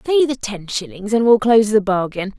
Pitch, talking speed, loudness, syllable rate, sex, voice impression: 215 Hz, 225 wpm, -17 LUFS, 5.4 syllables/s, female, feminine, adult-like, tensed, powerful, clear, fluent, intellectual, calm, elegant, slightly lively, strict, sharp